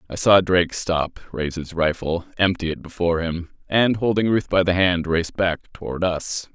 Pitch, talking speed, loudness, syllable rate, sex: 90 Hz, 195 wpm, -21 LUFS, 4.9 syllables/s, male